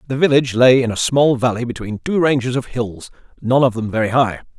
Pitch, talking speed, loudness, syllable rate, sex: 125 Hz, 220 wpm, -17 LUFS, 5.9 syllables/s, male